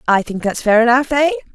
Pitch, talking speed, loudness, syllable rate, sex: 250 Hz, 195 wpm, -15 LUFS, 6.0 syllables/s, female